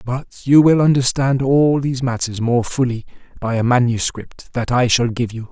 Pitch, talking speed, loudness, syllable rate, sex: 125 Hz, 185 wpm, -17 LUFS, 4.8 syllables/s, male